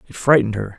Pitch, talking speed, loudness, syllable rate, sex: 115 Hz, 230 wpm, -17 LUFS, 7.7 syllables/s, male